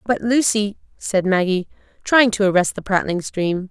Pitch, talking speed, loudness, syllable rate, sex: 200 Hz, 160 wpm, -19 LUFS, 4.6 syllables/s, female